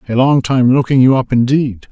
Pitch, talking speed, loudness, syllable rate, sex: 130 Hz, 220 wpm, -12 LUFS, 5.2 syllables/s, male